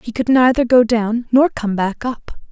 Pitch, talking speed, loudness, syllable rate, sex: 235 Hz, 215 wpm, -16 LUFS, 4.5 syllables/s, female